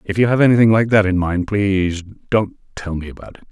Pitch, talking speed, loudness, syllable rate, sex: 100 Hz, 240 wpm, -16 LUFS, 5.6 syllables/s, male